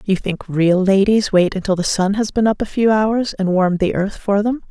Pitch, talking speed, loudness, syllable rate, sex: 200 Hz, 255 wpm, -17 LUFS, 5.0 syllables/s, female